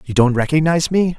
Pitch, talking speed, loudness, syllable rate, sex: 150 Hz, 205 wpm, -16 LUFS, 6.4 syllables/s, male